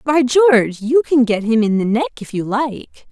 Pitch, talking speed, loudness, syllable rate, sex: 245 Hz, 230 wpm, -16 LUFS, 4.6 syllables/s, female